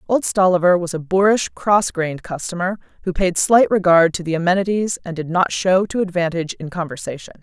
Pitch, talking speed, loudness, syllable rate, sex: 180 Hz, 185 wpm, -18 LUFS, 5.7 syllables/s, female